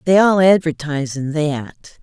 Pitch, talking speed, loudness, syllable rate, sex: 160 Hz, 150 wpm, -17 LUFS, 4.3 syllables/s, female